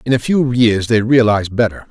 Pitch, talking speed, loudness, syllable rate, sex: 115 Hz, 220 wpm, -14 LUFS, 5.5 syllables/s, male